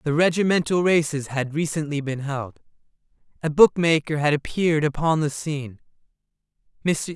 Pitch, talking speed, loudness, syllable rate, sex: 150 Hz, 115 wpm, -22 LUFS, 5.2 syllables/s, male